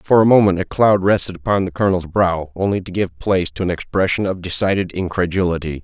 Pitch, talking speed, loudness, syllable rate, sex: 90 Hz, 205 wpm, -18 LUFS, 6.1 syllables/s, male